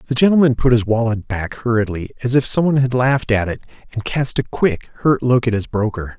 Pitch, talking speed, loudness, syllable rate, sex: 120 Hz, 235 wpm, -18 LUFS, 5.9 syllables/s, male